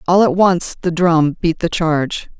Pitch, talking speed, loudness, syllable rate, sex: 170 Hz, 200 wpm, -16 LUFS, 4.4 syllables/s, female